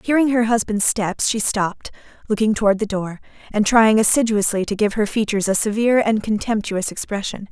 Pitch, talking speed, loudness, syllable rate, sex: 215 Hz, 175 wpm, -19 LUFS, 5.7 syllables/s, female